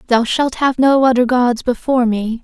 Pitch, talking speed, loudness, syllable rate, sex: 245 Hz, 195 wpm, -15 LUFS, 4.9 syllables/s, female